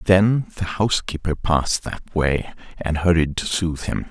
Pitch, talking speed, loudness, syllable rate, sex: 85 Hz, 160 wpm, -21 LUFS, 4.6 syllables/s, male